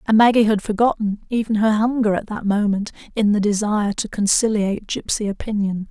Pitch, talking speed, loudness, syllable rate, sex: 210 Hz, 175 wpm, -19 LUFS, 5.7 syllables/s, female